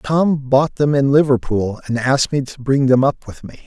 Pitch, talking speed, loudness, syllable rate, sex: 135 Hz, 230 wpm, -16 LUFS, 4.8 syllables/s, male